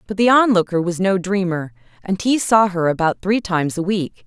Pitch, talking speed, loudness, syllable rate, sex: 185 Hz, 210 wpm, -18 LUFS, 5.3 syllables/s, female